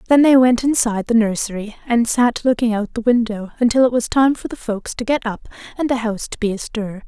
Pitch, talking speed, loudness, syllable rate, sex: 230 Hz, 235 wpm, -18 LUFS, 5.8 syllables/s, female